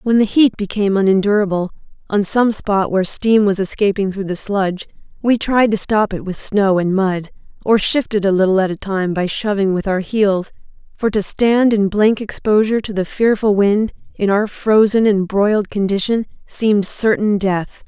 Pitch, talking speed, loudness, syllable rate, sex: 205 Hz, 185 wpm, -16 LUFS, 4.9 syllables/s, female